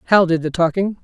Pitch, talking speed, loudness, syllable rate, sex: 175 Hz, 230 wpm, -17 LUFS, 6.3 syllables/s, female